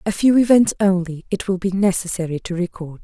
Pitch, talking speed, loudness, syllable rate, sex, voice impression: 190 Hz, 195 wpm, -19 LUFS, 5.7 syllables/s, female, very feminine, adult-like, slightly soft, slightly intellectual, calm, elegant